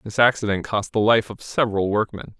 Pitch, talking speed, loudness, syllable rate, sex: 110 Hz, 200 wpm, -21 LUFS, 5.7 syllables/s, male